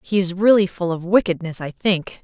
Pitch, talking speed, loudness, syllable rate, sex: 185 Hz, 215 wpm, -19 LUFS, 5.2 syllables/s, female